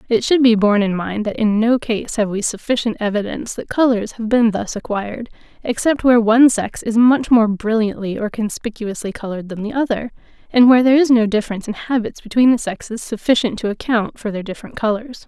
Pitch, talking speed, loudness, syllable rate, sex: 225 Hz, 205 wpm, -17 LUFS, 6.0 syllables/s, female